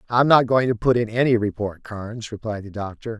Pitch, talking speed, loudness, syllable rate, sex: 115 Hz, 225 wpm, -21 LUFS, 5.7 syllables/s, male